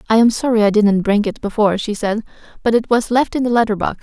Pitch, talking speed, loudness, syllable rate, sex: 220 Hz, 270 wpm, -16 LUFS, 6.4 syllables/s, female